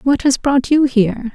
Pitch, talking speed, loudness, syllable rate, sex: 260 Hz, 225 wpm, -15 LUFS, 4.8 syllables/s, female